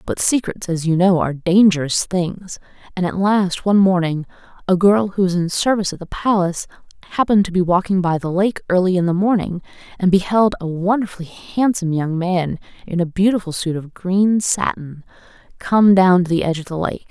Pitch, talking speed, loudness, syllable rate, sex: 185 Hz, 195 wpm, -18 LUFS, 5.5 syllables/s, female